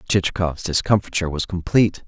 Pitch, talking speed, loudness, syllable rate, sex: 90 Hz, 115 wpm, -20 LUFS, 6.4 syllables/s, male